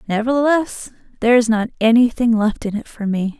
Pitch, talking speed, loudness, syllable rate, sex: 230 Hz, 175 wpm, -17 LUFS, 5.6 syllables/s, female